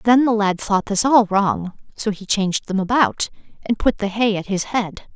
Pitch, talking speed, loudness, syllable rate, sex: 210 Hz, 220 wpm, -19 LUFS, 4.7 syllables/s, female